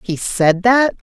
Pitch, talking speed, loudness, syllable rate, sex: 210 Hz, 160 wpm, -15 LUFS, 3.2 syllables/s, female